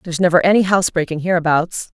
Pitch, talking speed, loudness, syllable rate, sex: 175 Hz, 150 wpm, -16 LUFS, 7.2 syllables/s, female